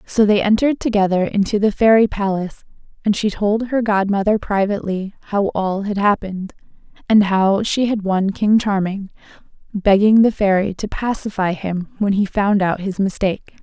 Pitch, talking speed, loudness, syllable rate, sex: 200 Hz, 165 wpm, -18 LUFS, 5.1 syllables/s, female